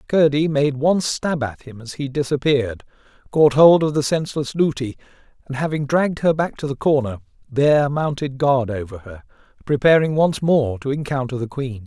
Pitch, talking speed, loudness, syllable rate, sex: 140 Hz, 175 wpm, -19 LUFS, 5.3 syllables/s, male